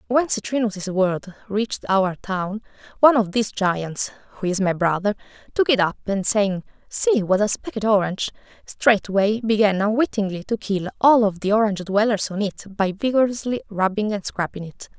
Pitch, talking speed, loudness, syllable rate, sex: 205 Hz, 170 wpm, -21 LUFS, 5.1 syllables/s, female